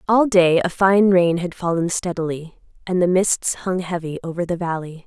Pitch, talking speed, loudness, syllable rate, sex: 175 Hz, 190 wpm, -19 LUFS, 4.8 syllables/s, female